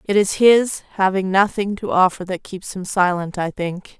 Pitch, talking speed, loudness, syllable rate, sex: 190 Hz, 195 wpm, -19 LUFS, 4.4 syllables/s, female